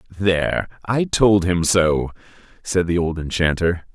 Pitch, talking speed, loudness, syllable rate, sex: 90 Hz, 135 wpm, -19 LUFS, 3.9 syllables/s, male